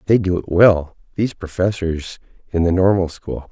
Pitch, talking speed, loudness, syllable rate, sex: 90 Hz, 170 wpm, -18 LUFS, 5.0 syllables/s, male